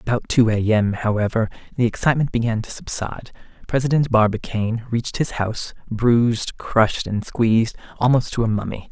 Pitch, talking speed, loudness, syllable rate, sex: 115 Hz, 155 wpm, -20 LUFS, 5.6 syllables/s, male